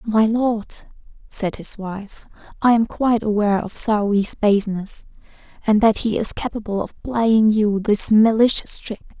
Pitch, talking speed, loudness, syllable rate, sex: 215 Hz, 150 wpm, -19 LUFS, 4.3 syllables/s, female